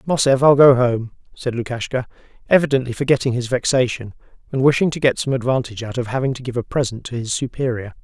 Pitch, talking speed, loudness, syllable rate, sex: 125 Hz, 195 wpm, -19 LUFS, 6.3 syllables/s, male